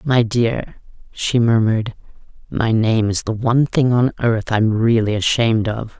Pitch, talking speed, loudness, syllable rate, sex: 115 Hz, 160 wpm, -17 LUFS, 4.4 syllables/s, female